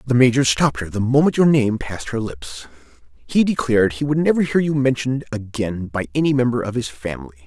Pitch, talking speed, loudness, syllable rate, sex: 120 Hz, 210 wpm, -19 LUFS, 6.0 syllables/s, male